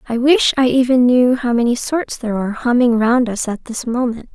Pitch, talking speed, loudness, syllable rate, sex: 245 Hz, 220 wpm, -16 LUFS, 5.4 syllables/s, female